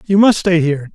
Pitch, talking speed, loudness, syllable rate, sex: 175 Hz, 255 wpm, -14 LUFS, 6.0 syllables/s, male